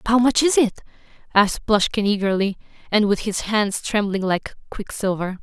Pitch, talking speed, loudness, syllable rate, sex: 210 Hz, 165 wpm, -20 LUFS, 5.3 syllables/s, female